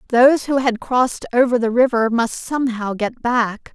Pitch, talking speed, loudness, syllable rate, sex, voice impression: 240 Hz, 175 wpm, -18 LUFS, 5.1 syllables/s, female, feminine, adult-like, soft, slightly clear, slightly halting, calm, friendly, reassuring, slightly elegant, lively, kind, modest